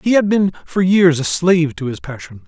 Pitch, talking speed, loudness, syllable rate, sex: 170 Hz, 245 wpm, -15 LUFS, 5.3 syllables/s, male